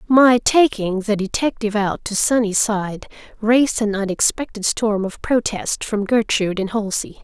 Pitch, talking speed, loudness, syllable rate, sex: 215 Hz, 140 wpm, -19 LUFS, 4.8 syllables/s, female